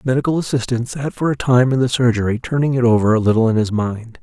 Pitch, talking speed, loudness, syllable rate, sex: 125 Hz, 255 wpm, -17 LUFS, 6.5 syllables/s, male